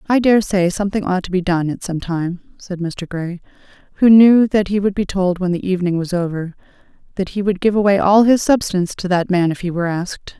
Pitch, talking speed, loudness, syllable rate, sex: 190 Hz, 235 wpm, -17 LUFS, 5.8 syllables/s, female